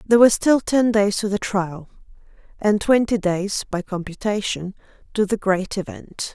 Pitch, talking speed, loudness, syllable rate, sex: 205 Hz, 160 wpm, -21 LUFS, 4.7 syllables/s, female